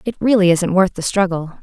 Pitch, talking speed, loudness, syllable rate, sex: 185 Hz, 220 wpm, -16 LUFS, 5.4 syllables/s, female